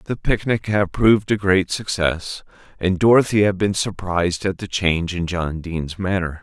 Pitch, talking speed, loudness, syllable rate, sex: 95 Hz, 175 wpm, -20 LUFS, 4.8 syllables/s, male